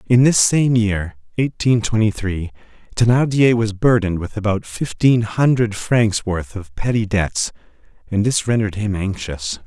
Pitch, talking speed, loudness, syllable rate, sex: 105 Hz, 150 wpm, -18 LUFS, 4.5 syllables/s, male